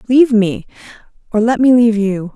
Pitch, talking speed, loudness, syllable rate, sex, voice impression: 225 Hz, 180 wpm, -13 LUFS, 6.0 syllables/s, female, feminine, adult-like, slightly soft, calm, slightly friendly, slightly reassuring, kind